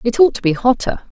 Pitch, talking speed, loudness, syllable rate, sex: 235 Hz, 255 wpm, -16 LUFS, 6.1 syllables/s, female